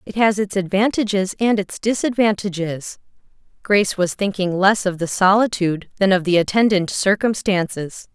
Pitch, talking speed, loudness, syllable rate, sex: 195 Hz, 140 wpm, -18 LUFS, 5.0 syllables/s, female